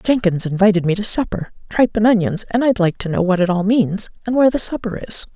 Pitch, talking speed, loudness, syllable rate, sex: 205 Hz, 245 wpm, -17 LUFS, 6.1 syllables/s, female